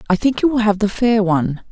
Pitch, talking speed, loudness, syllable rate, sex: 210 Hz, 280 wpm, -16 LUFS, 6.0 syllables/s, female